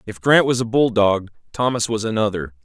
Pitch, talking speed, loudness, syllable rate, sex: 110 Hz, 180 wpm, -19 LUFS, 5.5 syllables/s, male